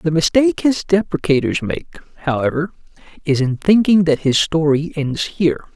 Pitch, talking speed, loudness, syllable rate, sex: 165 Hz, 145 wpm, -17 LUFS, 4.9 syllables/s, male